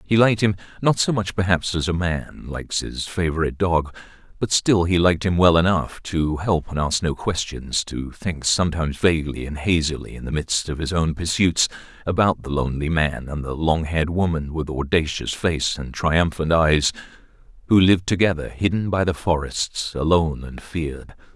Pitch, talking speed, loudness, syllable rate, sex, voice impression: 85 Hz, 175 wpm, -21 LUFS, 5.1 syllables/s, male, masculine, middle-aged, tensed, powerful, slightly muffled, slightly raspy, cool, calm, mature, wild, lively, strict